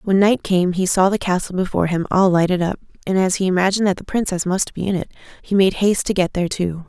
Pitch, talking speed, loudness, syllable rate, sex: 185 Hz, 260 wpm, -18 LUFS, 6.5 syllables/s, female